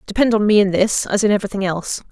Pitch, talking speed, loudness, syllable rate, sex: 205 Hz, 255 wpm, -17 LUFS, 7.3 syllables/s, female